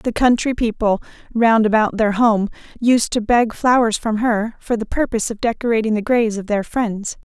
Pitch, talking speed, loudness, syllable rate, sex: 225 Hz, 190 wpm, -18 LUFS, 5.1 syllables/s, female